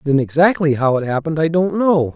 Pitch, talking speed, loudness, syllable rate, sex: 155 Hz, 220 wpm, -16 LUFS, 5.9 syllables/s, male